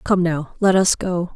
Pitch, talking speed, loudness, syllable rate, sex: 180 Hz, 220 wpm, -19 LUFS, 4.2 syllables/s, female